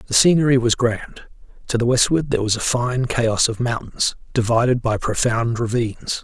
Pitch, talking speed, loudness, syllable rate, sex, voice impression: 120 Hz, 175 wpm, -19 LUFS, 5.1 syllables/s, male, very masculine, very adult-like, middle-aged, very thick, very tensed, very powerful, very bright, hard, very clear, very fluent, very raspy, cool, intellectual, very refreshing, sincere, calm, mature, friendly, reassuring, very unique, very wild, slightly sweet, very lively, kind, intense